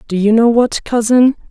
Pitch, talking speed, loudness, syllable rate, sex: 230 Hz, 200 wpm, -12 LUFS, 4.9 syllables/s, female